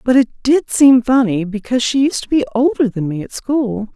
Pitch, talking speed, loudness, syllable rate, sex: 250 Hz, 230 wpm, -15 LUFS, 5.3 syllables/s, female